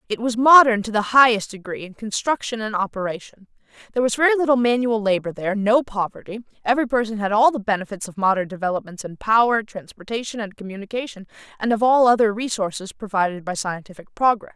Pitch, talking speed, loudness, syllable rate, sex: 215 Hz, 175 wpm, -20 LUFS, 6.3 syllables/s, female